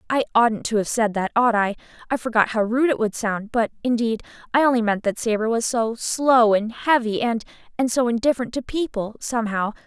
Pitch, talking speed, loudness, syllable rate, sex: 230 Hz, 200 wpm, -21 LUFS, 5.5 syllables/s, female